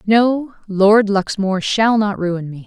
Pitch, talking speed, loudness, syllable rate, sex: 205 Hz, 155 wpm, -16 LUFS, 3.8 syllables/s, female